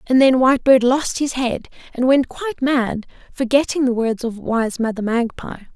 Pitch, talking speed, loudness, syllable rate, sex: 250 Hz, 175 wpm, -18 LUFS, 4.7 syllables/s, female